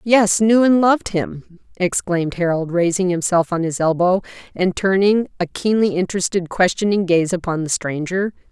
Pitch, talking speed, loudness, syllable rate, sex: 185 Hz, 155 wpm, -18 LUFS, 4.9 syllables/s, female